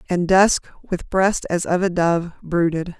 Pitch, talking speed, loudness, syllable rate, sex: 175 Hz, 180 wpm, -20 LUFS, 4.2 syllables/s, female